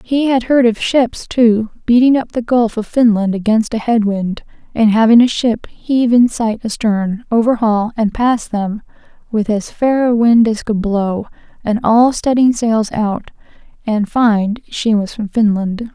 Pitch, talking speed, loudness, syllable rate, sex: 225 Hz, 175 wpm, -14 LUFS, 4.1 syllables/s, female